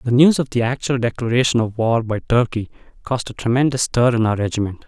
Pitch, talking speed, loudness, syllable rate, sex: 120 Hz, 210 wpm, -19 LUFS, 6.0 syllables/s, male